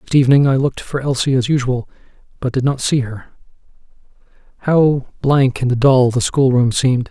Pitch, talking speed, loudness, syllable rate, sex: 130 Hz, 175 wpm, -16 LUFS, 5.6 syllables/s, male